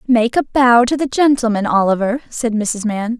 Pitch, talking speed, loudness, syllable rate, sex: 235 Hz, 190 wpm, -15 LUFS, 4.8 syllables/s, female